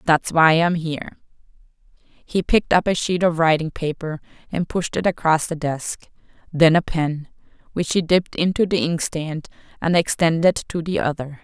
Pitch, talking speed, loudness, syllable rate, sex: 165 Hz, 165 wpm, -20 LUFS, 4.8 syllables/s, female